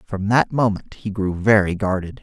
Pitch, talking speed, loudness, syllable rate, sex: 100 Hz, 190 wpm, -20 LUFS, 4.8 syllables/s, male